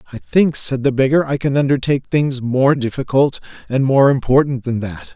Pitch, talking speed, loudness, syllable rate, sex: 135 Hz, 185 wpm, -16 LUFS, 5.2 syllables/s, male